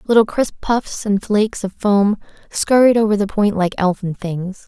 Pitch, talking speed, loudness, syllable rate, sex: 205 Hz, 180 wpm, -17 LUFS, 4.6 syllables/s, female